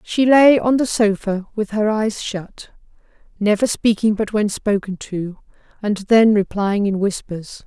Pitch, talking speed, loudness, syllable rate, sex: 210 Hz, 155 wpm, -18 LUFS, 4.0 syllables/s, female